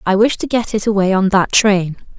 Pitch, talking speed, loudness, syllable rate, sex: 200 Hz, 245 wpm, -15 LUFS, 5.3 syllables/s, female